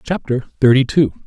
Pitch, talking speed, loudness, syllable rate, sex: 130 Hz, 145 wpm, -16 LUFS, 5.3 syllables/s, male